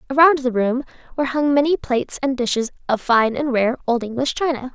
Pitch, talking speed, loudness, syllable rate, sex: 260 Hz, 200 wpm, -19 LUFS, 5.8 syllables/s, female